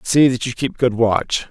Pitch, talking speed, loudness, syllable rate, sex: 120 Hz, 240 wpm, -18 LUFS, 4.4 syllables/s, male